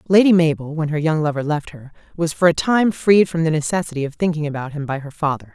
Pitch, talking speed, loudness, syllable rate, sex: 160 Hz, 250 wpm, -19 LUFS, 6.2 syllables/s, female